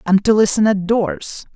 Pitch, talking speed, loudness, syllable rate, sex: 205 Hz, 195 wpm, -16 LUFS, 4.4 syllables/s, female